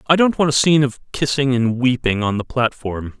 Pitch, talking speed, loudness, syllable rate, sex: 130 Hz, 225 wpm, -18 LUFS, 5.6 syllables/s, male